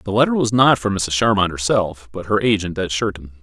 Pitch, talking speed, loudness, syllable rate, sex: 100 Hz, 230 wpm, -18 LUFS, 5.6 syllables/s, male